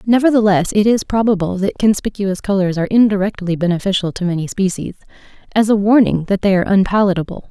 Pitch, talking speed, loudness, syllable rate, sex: 200 Hz, 160 wpm, -15 LUFS, 6.5 syllables/s, female